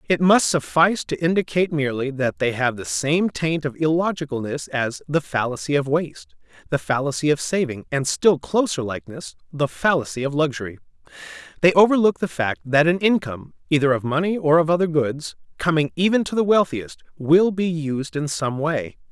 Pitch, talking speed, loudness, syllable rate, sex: 145 Hz, 175 wpm, -21 LUFS, 5.4 syllables/s, male